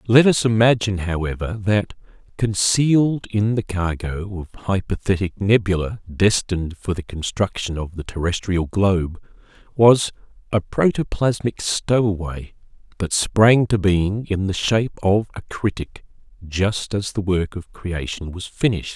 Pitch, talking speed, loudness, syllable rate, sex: 100 Hz, 135 wpm, -20 LUFS, 4.4 syllables/s, male